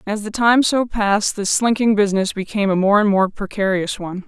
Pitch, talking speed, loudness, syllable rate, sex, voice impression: 205 Hz, 210 wpm, -18 LUFS, 5.8 syllables/s, female, feminine, adult-like, tensed, powerful, slightly bright, clear, fluent, intellectual, elegant, lively, slightly strict, sharp